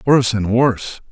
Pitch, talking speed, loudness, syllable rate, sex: 115 Hz, 160 wpm, -16 LUFS, 5.4 syllables/s, male